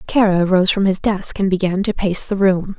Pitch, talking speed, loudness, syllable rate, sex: 190 Hz, 235 wpm, -17 LUFS, 4.9 syllables/s, female